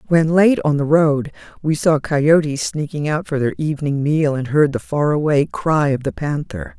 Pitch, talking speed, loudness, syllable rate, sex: 150 Hz, 205 wpm, -18 LUFS, 4.6 syllables/s, female